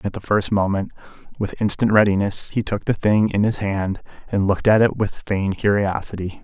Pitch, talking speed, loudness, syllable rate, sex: 100 Hz, 195 wpm, -20 LUFS, 5.4 syllables/s, male